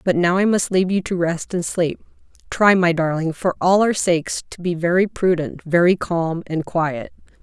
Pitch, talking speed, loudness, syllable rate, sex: 175 Hz, 200 wpm, -19 LUFS, 4.9 syllables/s, female